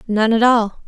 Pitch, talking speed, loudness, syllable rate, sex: 225 Hz, 205 wpm, -15 LUFS, 4.5 syllables/s, female